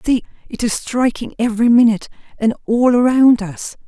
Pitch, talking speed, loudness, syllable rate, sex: 235 Hz, 155 wpm, -16 LUFS, 5.5 syllables/s, female